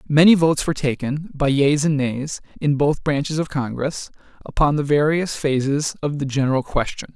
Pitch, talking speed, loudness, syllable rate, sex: 145 Hz, 175 wpm, -20 LUFS, 5.2 syllables/s, male